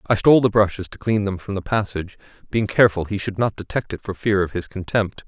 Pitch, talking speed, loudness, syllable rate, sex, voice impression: 100 Hz, 250 wpm, -21 LUFS, 6.2 syllables/s, male, very masculine, very adult-like, very middle-aged, thick, tensed, slightly powerful, bright, hard, clear, fluent, slightly raspy, cool, very intellectual, refreshing, sincere, calm, mature, friendly, reassuring, unique, slightly elegant, wild, sweet, slightly lively, very kind